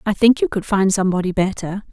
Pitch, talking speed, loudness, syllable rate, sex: 200 Hz, 220 wpm, -18 LUFS, 6.3 syllables/s, female